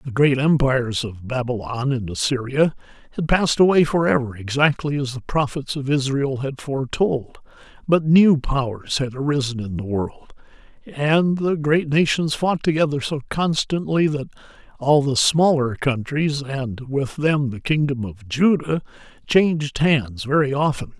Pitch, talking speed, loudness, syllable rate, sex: 140 Hz, 150 wpm, -20 LUFS, 4.5 syllables/s, male